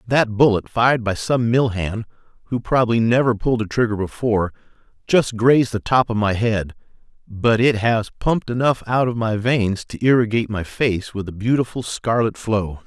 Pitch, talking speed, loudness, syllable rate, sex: 115 Hz, 180 wpm, -19 LUFS, 5.1 syllables/s, male